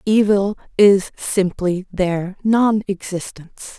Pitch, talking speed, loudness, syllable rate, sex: 195 Hz, 80 wpm, -18 LUFS, 3.3 syllables/s, female